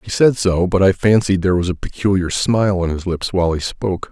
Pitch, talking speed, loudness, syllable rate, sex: 95 Hz, 250 wpm, -17 LUFS, 6.0 syllables/s, male